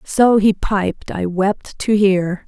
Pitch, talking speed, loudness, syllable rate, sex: 200 Hz, 170 wpm, -17 LUFS, 3.0 syllables/s, female